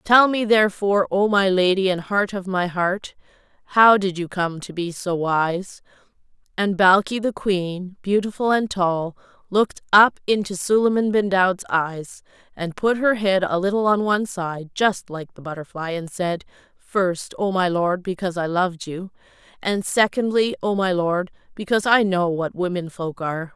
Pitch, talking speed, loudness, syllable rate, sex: 190 Hz, 175 wpm, -21 LUFS, 4.6 syllables/s, female